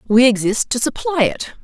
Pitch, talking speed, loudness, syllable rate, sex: 245 Hz, 185 wpm, -17 LUFS, 4.8 syllables/s, female